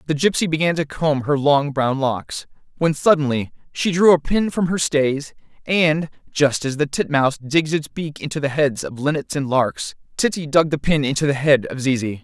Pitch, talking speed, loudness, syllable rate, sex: 145 Hz, 205 wpm, -19 LUFS, 4.9 syllables/s, male